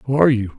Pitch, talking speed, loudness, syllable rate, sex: 130 Hz, 305 wpm, -17 LUFS, 7.3 syllables/s, male